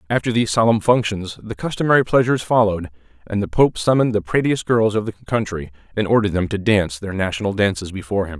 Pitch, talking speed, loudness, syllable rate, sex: 105 Hz, 200 wpm, -19 LUFS, 6.7 syllables/s, male